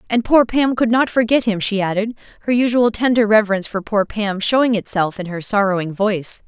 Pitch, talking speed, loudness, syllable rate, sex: 215 Hz, 205 wpm, -17 LUFS, 5.7 syllables/s, female